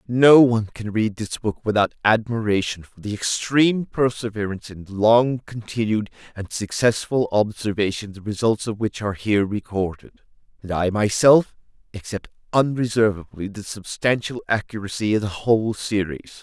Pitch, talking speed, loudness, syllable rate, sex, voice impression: 110 Hz, 135 wpm, -21 LUFS, 5.1 syllables/s, male, masculine, adult-like, tensed, powerful, bright, clear, slightly halting, friendly, unique, slightly wild, lively, intense, light